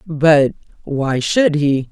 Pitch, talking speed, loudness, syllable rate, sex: 150 Hz, 125 wpm, -16 LUFS, 2.7 syllables/s, female